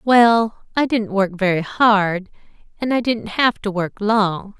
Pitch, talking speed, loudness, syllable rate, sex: 210 Hz, 170 wpm, -18 LUFS, 3.7 syllables/s, female